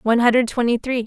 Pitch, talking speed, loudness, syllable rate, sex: 240 Hz, 225 wpm, -18 LUFS, 6.8 syllables/s, female